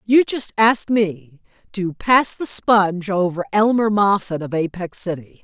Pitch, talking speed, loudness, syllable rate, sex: 195 Hz, 155 wpm, -18 LUFS, 4.1 syllables/s, female